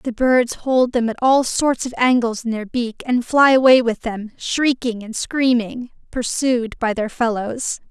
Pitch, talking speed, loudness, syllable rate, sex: 240 Hz, 180 wpm, -18 LUFS, 4.0 syllables/s, female